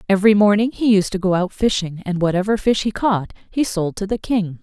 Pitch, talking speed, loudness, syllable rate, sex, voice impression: 200 Hz, 235 wpm, -18 LUFS, 5.7 syllables/s, female, feminine, adult-like, slightly muffled, slightly calm, friendly, slightly kind